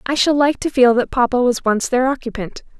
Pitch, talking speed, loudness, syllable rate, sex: 255 Hz, 235 wpm, -16 LUFS, 5.5 syllables/s, female